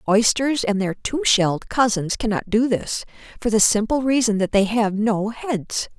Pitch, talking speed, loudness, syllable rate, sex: 220 Hz, 180 wpm, -20 LUFS, 4.5 syllables/s, female